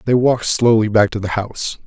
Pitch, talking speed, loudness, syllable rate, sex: 110 Hz, 225 wpm, -16 LUFS, 6.0 syllables/s, male